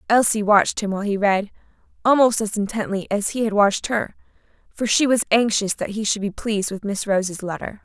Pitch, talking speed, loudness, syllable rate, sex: 210 Hz, 205 wpm, -20 LUFS, 5.9 syllables/s, female